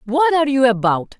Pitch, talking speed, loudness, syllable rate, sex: 260 Hz, 200 wpm, -16 LUFS, 5.7 syllables/s, female